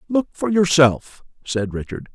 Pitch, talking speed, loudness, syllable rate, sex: 150 Hz, 140 wpm, -19 LUFS, 4.1 syllables/s, male